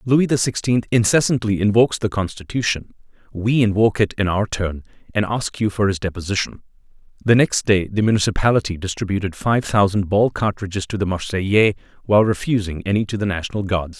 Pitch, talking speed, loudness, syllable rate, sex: 105 Hz, 165 wpm, -19 LUFS, 5.9 syllables/s, male